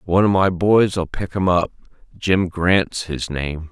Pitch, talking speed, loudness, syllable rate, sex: 90 Hz, 180 wpm, -19 LUFS, 3.8 syllables/s, male